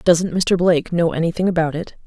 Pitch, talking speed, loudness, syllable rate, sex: 170 Hz, 205 wpm, -18 LUFS, 5.8 syllables/s, female